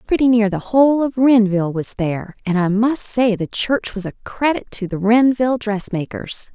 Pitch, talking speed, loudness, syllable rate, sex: 220 Hz, 190 wpm, -18 LUFS, 5.1 syllables/s, female